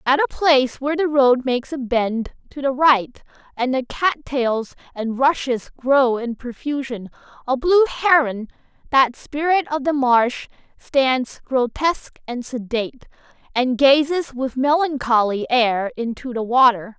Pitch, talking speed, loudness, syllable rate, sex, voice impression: 260 Hz, 145 wpm, -19 LUFS, 4.2 syllables/s, female, feminine, slightly adult-like, powerful, clear, slightly cute, slightly unique, slightly lively